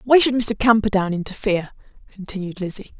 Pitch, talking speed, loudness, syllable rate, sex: 210 Hz, 140 wpm, -20 LUFS, 6.0 syllables/s, female